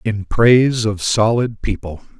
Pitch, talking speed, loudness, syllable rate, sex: 110 Hz, 135 wpm, -16 LUFS, 4.1 syllables/s, male